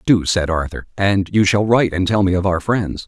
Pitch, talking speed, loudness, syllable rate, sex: 95 Hz, 255 wpm, -17 LUFS, 5.3 syllables/s, male